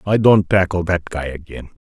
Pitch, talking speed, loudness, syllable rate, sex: 85 Hz, 195 wpm, -17 LUFS, 5.0 syllables/s, male